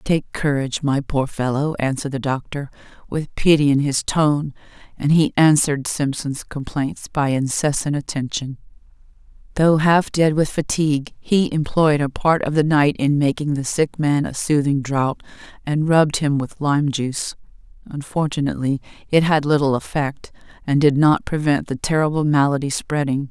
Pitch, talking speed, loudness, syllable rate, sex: 145 Hz, 155 wpm, -19 LUFS, 4.8 syllables/s, female